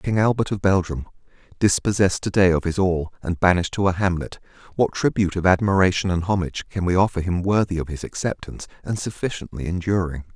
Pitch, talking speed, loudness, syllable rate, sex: 90 Hz, 180 wpm, -22 LUFS, 6.2 syllables/s, male